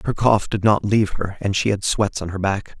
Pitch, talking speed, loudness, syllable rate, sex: 100 Hz, 280 wpm, -20 LUFS, 5.4 syllables/s, male